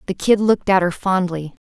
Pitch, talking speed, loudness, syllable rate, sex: 185 Hz, 215 wpm, -18 LUFS, 5.7 syllables/s, female